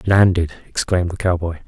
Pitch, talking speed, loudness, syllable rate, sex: 90 Hz, 180 wpm, -19 LUFS, 6.7 syllables/s, male